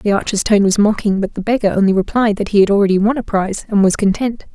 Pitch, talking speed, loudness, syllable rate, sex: 205 Hz, 265 wpm, -15 LUFS, 6.6 syllables/s, female